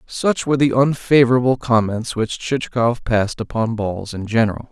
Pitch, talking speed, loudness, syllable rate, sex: 120 Hz, 155 wpm, -18 LUFS, 5.3 syllables/s, male